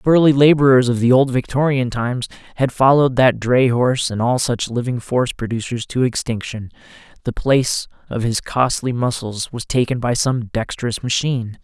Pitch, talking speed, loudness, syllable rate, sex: 125 Hz, 170 wpm, -18 LUFS, 5.4 syllables/s, male